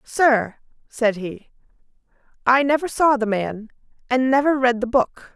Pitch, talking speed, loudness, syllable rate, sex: 250 Hz, 145 wpm, -20 LUFS, 4.5 syllables/s, female